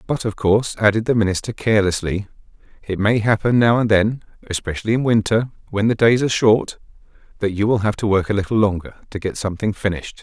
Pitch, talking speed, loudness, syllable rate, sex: 105 Hz, 200 wpm, -19 LUFS, 6.3 syllables/s, male